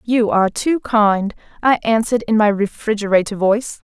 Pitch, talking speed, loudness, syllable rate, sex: 220 Hz, 155 wpm, -17 LUFS, 5.3 syllables/s, female